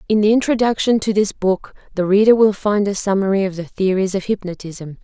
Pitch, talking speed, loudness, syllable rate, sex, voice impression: 200 Hz, 205 wpm, -17 LUFS, 5.6 syllables/s, female, feminine, slightly adult-like, slightly intellectual, calm, slightly reassuring, slightly kind